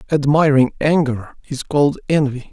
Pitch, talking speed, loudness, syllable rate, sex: 140 Hz, 120 wpm, -16 LUFS, 4.9 syllables/s, male